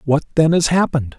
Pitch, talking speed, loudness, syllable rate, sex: 150 Hz, 200 wpm, -16 LUFS, 6.1 syllables/s, male